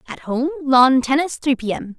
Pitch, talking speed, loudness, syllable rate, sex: 270 Hz, 210 wpm, -18 LUFS, 4.7 syllables/s, female